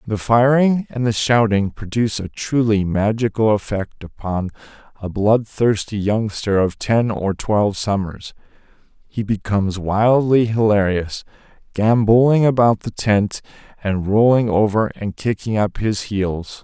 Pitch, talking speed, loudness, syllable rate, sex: 110 Hz, 130 wpm, -18 LUFS, 4.2 syllables/s, male